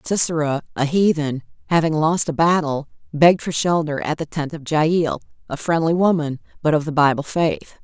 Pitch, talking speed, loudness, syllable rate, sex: 155 Hz, 175 wpm, -19 LUFS, 5.2 syllables/s, female